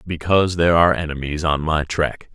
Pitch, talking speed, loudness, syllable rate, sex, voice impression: 80 Hz, 180 wpm, -19 LUFS, 5.9 syllables/s, male, masculine, adult-like, tensed, powerful, bright, clear, fluent, cool, intellectual, mature, friendly, reassuring, wild, lively, slightly strict